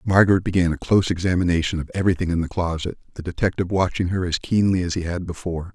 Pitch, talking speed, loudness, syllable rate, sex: 90 Hz, 210 wpm, -22 LUFS, 7.2 syllables/s, male